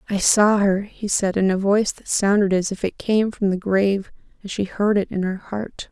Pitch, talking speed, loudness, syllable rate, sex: 200 Hz, 245 wpm, -20 LUFS, 5.0 syllables/s, female